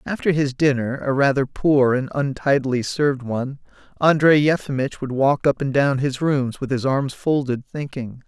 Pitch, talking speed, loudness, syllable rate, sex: 135 Hz, 160 wpm, -20 LUFS, 4.8 syllables/s, male